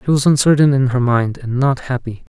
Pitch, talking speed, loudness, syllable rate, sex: 130 Hz, 225 wpm, -15 LUFS, 5.5 syllables/s, male